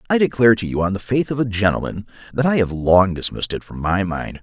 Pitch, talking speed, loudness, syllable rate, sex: 105 Hz, 260 wpm, -19 LUFS, 6.3 syllables/s, male